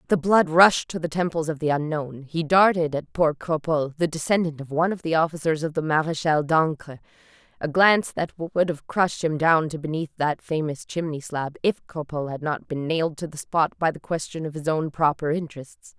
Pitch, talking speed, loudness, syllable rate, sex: 160 Hz, 210 wpm, -23 LUFS, 5.4 syllables/s, female